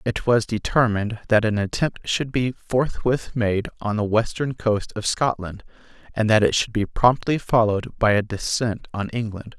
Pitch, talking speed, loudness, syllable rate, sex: 110 Hz, 175 wpm, -22 LUFS, 4.6 syllables/s, male